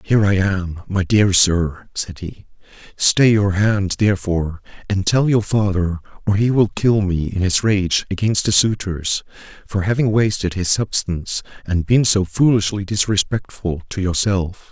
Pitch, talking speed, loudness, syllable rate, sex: 100 Hz, 160 wpm, -18 LUFS, 4.4 syllables/s, male